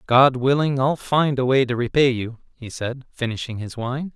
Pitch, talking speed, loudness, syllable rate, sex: 130 Hz, 200 wpm, -21 LUFS, 4.7 syllables/s, male